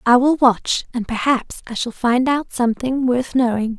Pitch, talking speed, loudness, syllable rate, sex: 245 Hz, 190 wpm, -18 LUFS, 4.5 syllables/s, female